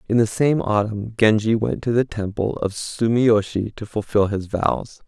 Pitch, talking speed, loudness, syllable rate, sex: 110 Hz, 175 wpm, -21 LUFS, 4.4 syllables/s, male